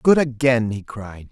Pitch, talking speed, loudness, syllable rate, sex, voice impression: 120 Hz, 185 wpm, -19 LUFS, 4.1 syllables/s, male, masculine, adult-like, tensed, powerful, bright, clear, raspy, intellectual, friendly, reassuring, wild, lively